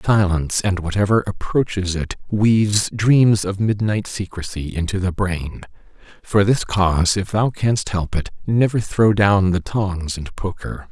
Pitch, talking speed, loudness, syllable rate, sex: 100 Hz, 155 wpm, -19 LUFS, 4.3 syllables/s, male